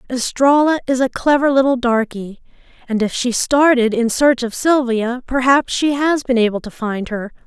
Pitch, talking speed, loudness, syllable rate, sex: 250 Hz, 175 wpm, -16 LUFS, 4.7 syllables/s, female